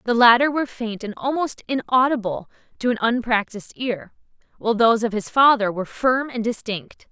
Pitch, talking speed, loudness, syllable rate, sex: 230 Hz, 170 wpm, -21 LUFS, 5.6 syllables/s, female